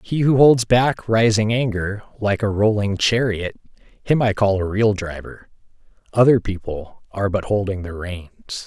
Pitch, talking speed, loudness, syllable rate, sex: 105 Hz, 160 wpm, -19 LUFS, 4.3 syllables/s, male